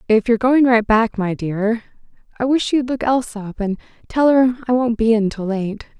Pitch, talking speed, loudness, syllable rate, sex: 230 Hz, 220 wpm, -18 LUFS, 5.1 syllables/s, female